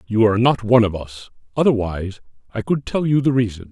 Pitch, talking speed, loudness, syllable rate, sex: 110 Hz, 210 wpm, -18 LUFS, 6.3 syllables/s, male